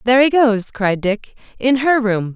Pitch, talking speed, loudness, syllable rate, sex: 230 Hz, 205 wpm, -16 LUFS, 4.5 syllables/s, female